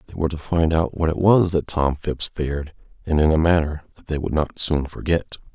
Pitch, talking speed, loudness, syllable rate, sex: 80 Hz, 240 wpm, -21 LUFS, 5.7 syllables/s, male